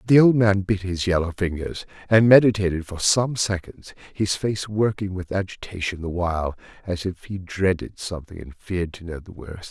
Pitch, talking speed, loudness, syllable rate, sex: 95 Hz, 185 wpm, -22 LUFS, 5.1 syllables/s, male